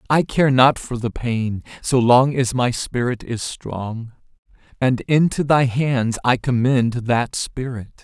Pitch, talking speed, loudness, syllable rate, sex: 125 Hz, 155 wpm, -19 LUFS, 3.6 syllables/s, male